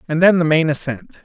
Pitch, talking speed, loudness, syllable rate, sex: 160 Hz, 240 wpm, -16 LUFS, 5.6 syllables/s, male